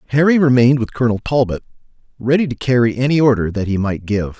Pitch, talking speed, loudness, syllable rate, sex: 125 Hz, 190 wpm, -16 LUFS, 6.6 syllables/s, male